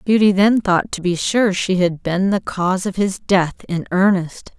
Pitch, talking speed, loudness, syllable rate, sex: 190 Hz, 210 wpm, -17 LUFS, 4.4 syllables/s, female